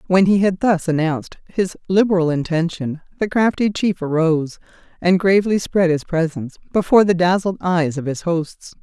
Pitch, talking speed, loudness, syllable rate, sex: 180 Hz, 165 wpm, -18 LUFS, 5.1 syllables/s, female